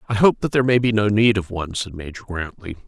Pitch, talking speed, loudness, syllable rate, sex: 105 Hz, 250 wpm, -20 LUFS, 6.2 syllables/s, male